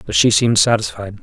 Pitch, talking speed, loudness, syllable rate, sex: 100 Hz, 195 wpm, -14 LUFS, 6.5 syllables/s, male